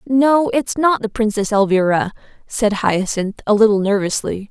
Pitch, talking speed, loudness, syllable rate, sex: 225 Hz, 145 wpm, -17 LUFS, 4.5 syllables/s, female